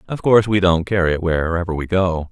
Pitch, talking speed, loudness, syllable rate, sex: 90 Hz, 235 wpm, -17 LUFS, 6.1 syllables/s, male